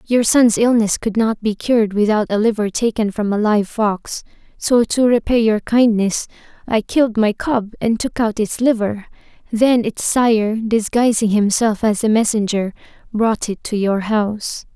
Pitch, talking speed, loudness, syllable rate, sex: 220 Hz, 170 wpm, -17 LUFS, 4.4 syllables/s, female